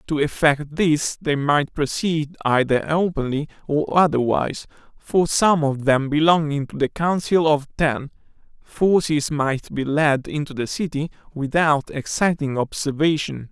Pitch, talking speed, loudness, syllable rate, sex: 150 Hz, 135 wpm, -21 LUFS, 4.2 syllables/s, male